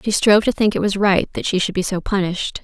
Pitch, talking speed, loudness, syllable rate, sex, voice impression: 200 Hz, 295 wpm, -18 LUFS, 6.3 syllables/s, female, feminine, adult-like, tensed, slightly dark, clear, slightly fluent, slightly halting, intellectual, calm, slightly strict, sharp